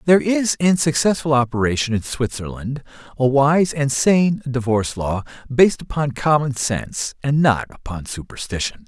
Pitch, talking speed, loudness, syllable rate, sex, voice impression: 135 Hz, 140 wpm, -19 LUFS, 4.9 syllables/s, male, very masculine, middle-aged, very thick, very tensed, powerful, bright, very soft, clear, fluent, slightly raspy, very cool, intellectual, refreshing, sincere, very calm, very friendly, very reassuring, very unique, very elegant, wild, very sweet, very lively, kind, slightly intense